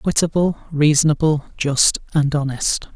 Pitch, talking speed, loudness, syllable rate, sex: 150 Hz, 100 wpm, -18 LUFS, 4.7 syllables/s, male